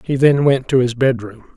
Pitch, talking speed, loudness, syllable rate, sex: 130 Hz, 230 wpm, -16 LUFS, 4.9 syllables/s, male